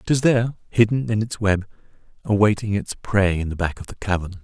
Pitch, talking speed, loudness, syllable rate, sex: 105 Hz, 190 wpm, -21 LUFS, 5.7 syllables/s, male